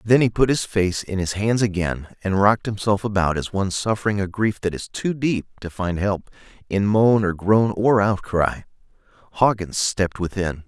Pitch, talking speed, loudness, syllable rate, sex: 100 Hz, 190 wpm, -21 LUFS, 4.9 syllables/s, male